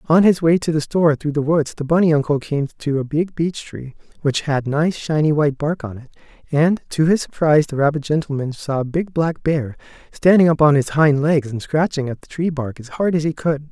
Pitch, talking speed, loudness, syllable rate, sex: 150 Hz, 240 wpm, -18 LUFS, 5.4 syllables/s, male